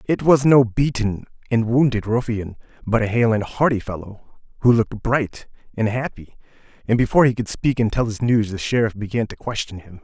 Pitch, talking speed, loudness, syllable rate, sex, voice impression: 115 Hz, 195 wpm, -20 LUFS, 5.4 syllables/s, male, very masculine, adult-like, cool, slightly refreshing, sincere